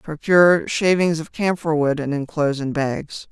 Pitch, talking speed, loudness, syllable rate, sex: 155 Hz, 165 wpm, -19 LUFS, 4.6 syllables/s, female